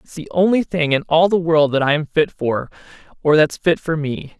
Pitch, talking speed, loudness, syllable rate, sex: 160 Hz, 245 wpm, -17 LUFS, 5.0 syllables/s, male